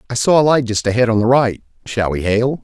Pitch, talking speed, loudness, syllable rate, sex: 120 Hz, 250 wpm, -15 LUFS, 5.9 syllables/s, male